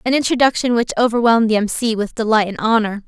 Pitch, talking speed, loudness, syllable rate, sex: 225 Hz, 215 wpm, -16 LUFS, 6.7 syllables/s, female